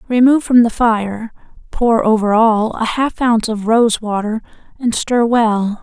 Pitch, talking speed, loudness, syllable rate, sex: 225 Hz, 165 wpm, -15 LUFS, 4.3 syllables/s, female